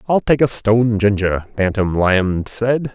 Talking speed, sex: 165 wpm, male